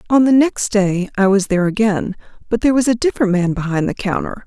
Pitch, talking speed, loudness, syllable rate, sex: 210 Hz, 230 wpm, -16 LUFS, 6.2 syllables/s, female